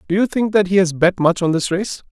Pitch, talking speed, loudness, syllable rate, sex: 185 Hz, 310 wpm, -17 LUFS, 5.9 syllables/s, male